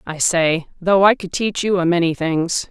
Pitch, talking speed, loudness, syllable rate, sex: 180 Hz, 220 wpm, -17 LUFS, 4.5 syllables/s, female